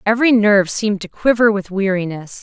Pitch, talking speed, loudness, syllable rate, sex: 205 Hz, 175 wpm, -16 LUFS, 6.1 syllables/s, female